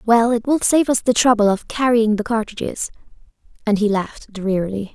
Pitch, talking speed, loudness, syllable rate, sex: 220 Hz, 180 wpm, -18 LUFS, 5.4 syllables/s, female